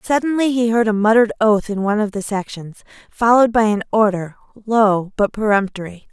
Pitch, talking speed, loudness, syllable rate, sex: 215 Hz, 175 wpm, -17 LUFS, 5.6 syllables/s, female